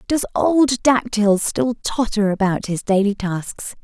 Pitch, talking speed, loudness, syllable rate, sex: 220 Hz, 140 wpm, -19 LUFS, 3.7 syllables/s, female